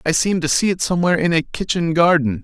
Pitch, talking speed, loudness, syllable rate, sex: 165 Hz, 245 wpm, -17 LUFS, 6.4 syllables/s, male